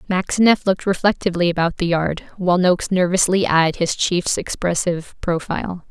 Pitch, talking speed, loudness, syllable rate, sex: 180 Hz, 140 wpm, -19 LUFS, 5.6 syllables/s, female